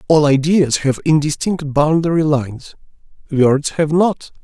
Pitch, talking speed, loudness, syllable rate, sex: 150 Hz, 120 wpm, -15 LUFS, 4.2 syllables/s, male